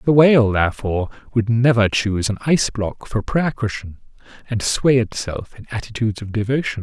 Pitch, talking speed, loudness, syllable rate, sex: 115 Hz, 165 wpm, -19 LUFS, 5.6 syllables/s, male